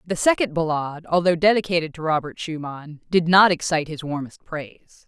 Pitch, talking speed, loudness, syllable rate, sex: 165 Hz, 165 wpm, -21 LUFS, 5.6 syllables/s, female